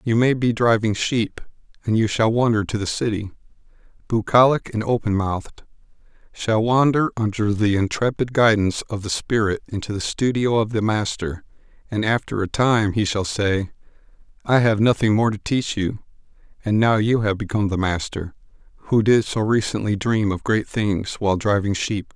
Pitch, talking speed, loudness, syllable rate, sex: 110 Hz, 170 wpm, -21 LUFS, 5.0 syllables/s, male